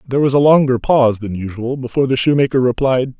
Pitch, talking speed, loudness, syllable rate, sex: 130 Hz, 205 wpm, -15 LUFS, 6.6 syllables/s, male